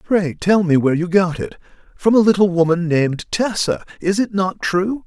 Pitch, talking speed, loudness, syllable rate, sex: 185 Hz, 190 wpm, -17 LUFS, 5.1 syllables/s, male